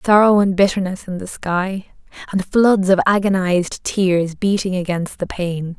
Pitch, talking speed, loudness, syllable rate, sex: 190 Hz, 155 wpm, -18 LUFS, 4.6 syllables/s, female